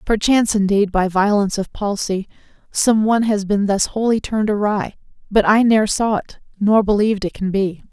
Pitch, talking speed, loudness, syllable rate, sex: 205 Hz, 180 wpm, -17 LUFS, 5.6 syllables/s, female